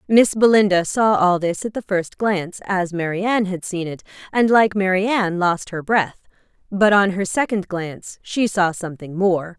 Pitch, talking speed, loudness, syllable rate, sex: 190 Hz, 195 wpm, -19 LUFS, 4.9 syllables/s, female